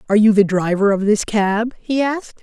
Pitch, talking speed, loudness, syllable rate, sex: 215 Hz, 225 wpm, -17 LUFS, 5.4 syllables/s, female